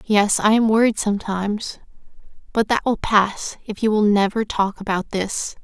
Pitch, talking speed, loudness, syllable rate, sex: 210 Hz, 170 wpm, -20 LUFS, 4.7 syllables/s, female